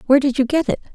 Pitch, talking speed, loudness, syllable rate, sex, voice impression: 270 Hz, 320 wpm, -18 LUFS, 9.0 syllables/s, female, feminine, middle-aged, tensed, powerful, clear, raspy, intellectual, calm, elegant, lively, strict, sharp